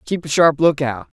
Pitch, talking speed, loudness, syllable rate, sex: 150 Hz, 200 wpm, -17 LUFS, 5.1 syllables/s, male